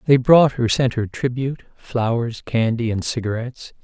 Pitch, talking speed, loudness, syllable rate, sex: 120 Hz, 155 wpm, -19 LUFS, 4.6 syllables/s, male